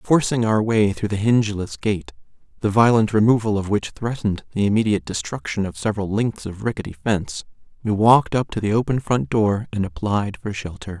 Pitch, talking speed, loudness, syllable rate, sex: 110 Hz, 185 wpm, -21 LUFS, 5.7 syllables/s, male